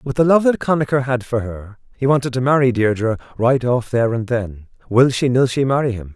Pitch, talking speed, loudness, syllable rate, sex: 125 Hz, 235 wpm, -17 LUFS, 5.6 syllables/s, male